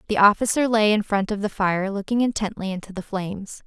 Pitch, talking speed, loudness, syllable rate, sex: 205 Hz, 215 wpm, -22 LUFS, 5.8 syllables/s, female